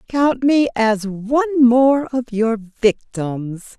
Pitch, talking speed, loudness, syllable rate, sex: 240 Hz, 125 wpm, -17 LUFS, 3.0 syllables/s, female